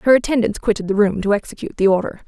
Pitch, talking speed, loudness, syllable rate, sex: 210 Hz, 240 wpm, -18 LUFS, 7.6 syllables/s, female